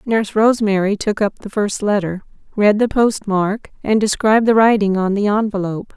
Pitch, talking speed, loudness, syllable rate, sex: 210 Hz, 170 wpm, -17 LUFS, 5.4 syllables/s, female